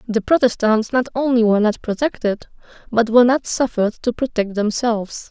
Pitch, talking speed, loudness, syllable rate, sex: 230 Hz, 160 wpm, -18 LUFS, 5.7 syllables/s, female